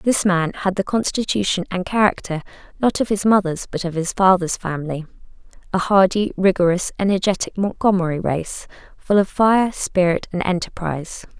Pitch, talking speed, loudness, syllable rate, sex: 190 Hz, 140 wpm, -19 LUFS, 5.2 syllables/s, female